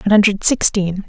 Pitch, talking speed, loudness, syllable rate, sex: 200 Hz, 165 wpm, -15 LUFS, 6.3 syllables/s, female